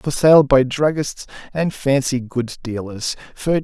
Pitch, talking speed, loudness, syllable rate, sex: 135 Hz, 150 wpm, -18 LUFS, 3.8 syllables/s, male